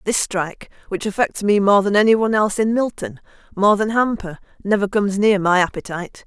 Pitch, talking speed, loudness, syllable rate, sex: 205 Hz, 170 wpm, -18 LUFS, 6.2 syllables/s, female